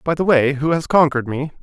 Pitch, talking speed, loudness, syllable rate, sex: 150 Hz, 260 wpm, -17 LUFS, 6.3 syllables/s, male